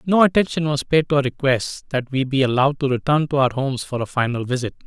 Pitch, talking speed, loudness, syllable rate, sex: 140 Hz, 245 wpm, -20 LUFS, 6.4 syllables/s, male